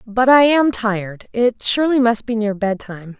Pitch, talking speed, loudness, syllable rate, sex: 230 Hz, 190 wpm, -16 LUFS, 5.0 syllables/s, female